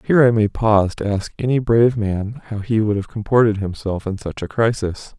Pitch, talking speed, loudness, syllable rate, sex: 110 Hz, 220 wpm, -19 LUFS, 5.5 syllables/s, male